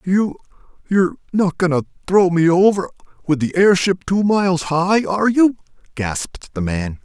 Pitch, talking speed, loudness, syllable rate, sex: 175 Hz, 145 wpm, -17 LUFS, 4.7 syllables/s, male